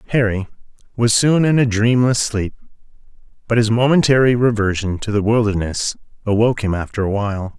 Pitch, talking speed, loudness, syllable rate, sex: 110 Hz, 150 wpm, -17 LUFS, 5.7 syllables/s, male